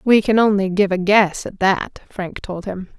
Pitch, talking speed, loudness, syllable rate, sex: 195 Hz, 220 wpm, -18 LUFS, 4.4 syllables/s, female